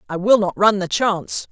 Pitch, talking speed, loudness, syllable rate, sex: 200 Hz, 235 wpm, -17 LUFS, 5.3 syllables/s, female